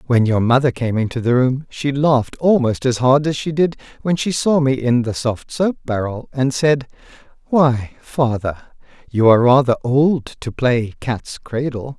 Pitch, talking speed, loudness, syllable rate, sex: 130 Hz, 180 wpm, -18 LUFS, 4.4 syllables/s, male